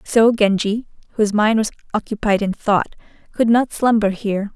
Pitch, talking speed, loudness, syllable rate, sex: 215 Hz, 160 wpm, -18 LUFS, 5.2 syllables/s, female